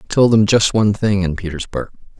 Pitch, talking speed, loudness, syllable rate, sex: 100 Hz, 220 wpm, -16 LUFS, 6.4 syllables/s, male